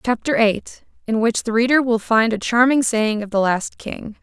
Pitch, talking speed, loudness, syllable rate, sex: 225 Hz, 200 wpm, -18 LUFS, 4.7 syllables/s, female